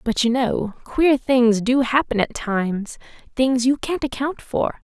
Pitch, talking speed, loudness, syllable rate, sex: 250 Hz, 160 wpm, -20 LUFS, 4.0 syllables/s, female